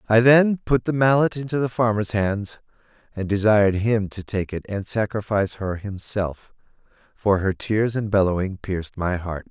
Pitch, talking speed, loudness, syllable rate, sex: 105 Hz, 170 wpm, -22 LUFS, 4.8 syllables/s, male